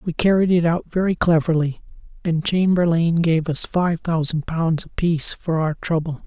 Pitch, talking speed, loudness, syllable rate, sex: 165 Hz, 165 wpm, -20 LUFS, 4.9 syllables/s, male